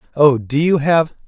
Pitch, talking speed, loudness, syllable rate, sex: 150 Hz, 190 wpm, -15 LUFS, 6.0 syllables/s, male